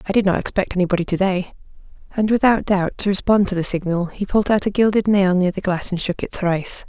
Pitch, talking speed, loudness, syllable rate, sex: 190 Hz, 245 wpm, -19 LUFS, 6.3 syllables/s, female